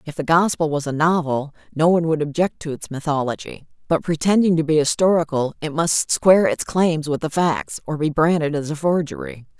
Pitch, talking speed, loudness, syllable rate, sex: 160 Hz, 200 wpm, -20 LUFS, 5.4 syllables/s, female